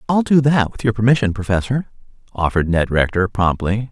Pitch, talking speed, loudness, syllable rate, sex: 110 Hz, 170 wpm, -17 LUFS, 5.7 syllables/s, male